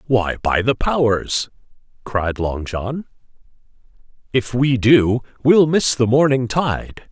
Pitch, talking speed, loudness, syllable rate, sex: 125 Hz, 125 wpm, -18 LUFS, 3.4 syllables/s, male